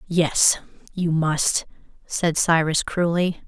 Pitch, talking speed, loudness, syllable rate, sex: 165 Hz, 105 wpm, -21 LUFS, 3.1 syllables/s, female